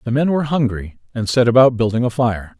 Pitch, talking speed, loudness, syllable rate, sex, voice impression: 120 Hz, 230 wpm, -17 LUFS, 6.0 syllables/s, male, very masculine, very adult-like, slightly thick, cool, sincere, slightly calm, slightly wild